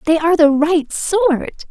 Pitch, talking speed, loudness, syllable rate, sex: 330 Hz, 175 wpm, -15 LUFS, 5.6 syllables/s, female